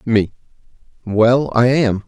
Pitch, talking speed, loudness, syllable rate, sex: 115 Hz, 115 wpm, -15 LUFS, 3.2 syllables/s, male